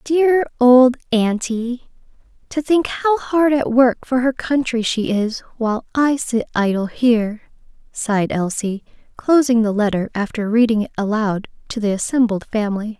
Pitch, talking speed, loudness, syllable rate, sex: 235 Hz, 150 wpm, -18 LUFS, 4.5 syllables/s, female